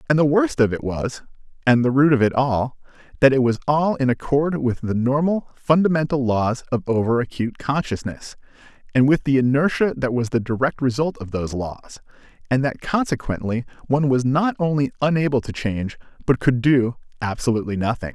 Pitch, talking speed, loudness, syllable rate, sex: 130 Hz, 180 wpm, -21 LUFS, 5.5 syllables/s, male